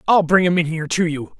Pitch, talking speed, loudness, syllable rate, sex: 165 Hz, 300 wpm, -18 LUFS, 6.5 syllables/s, male